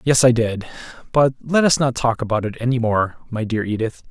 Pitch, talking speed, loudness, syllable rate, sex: 120 Hz, 220 wpm, -19 LUFS, 5.5 syllables/s, male